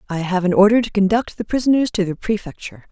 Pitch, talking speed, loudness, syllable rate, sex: 200 Hz, 225 wpm, -18 LUFS, 6.7 syllables/s, female